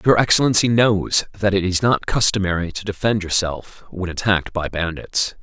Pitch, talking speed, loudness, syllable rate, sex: 100 Hz, 165 wpm, -19 LUFS, 5.1 syllables/s, male